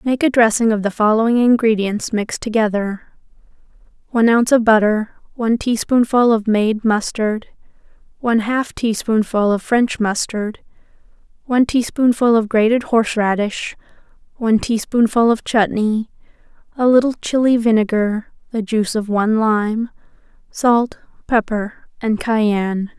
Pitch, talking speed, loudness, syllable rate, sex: 225 Hz, 120 wpm, -17 LUFS, 4.8 syllables/s, female